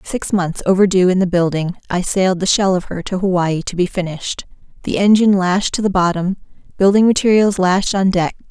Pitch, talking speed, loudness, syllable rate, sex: 190 Hz, 195 wpm, -16 LUFS, 5.6 syllables/s, female